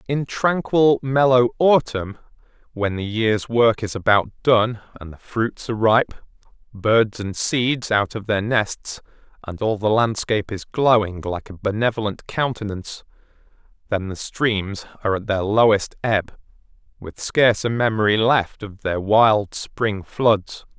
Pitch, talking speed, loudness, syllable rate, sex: 110 Hz, 145 wpm, -20 LUFS, 4.1 syllables/s, male